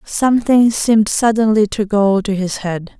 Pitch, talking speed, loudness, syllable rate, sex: 210 Hz, 160 wpm, -15 LUFS, 4.6 syllables/s, female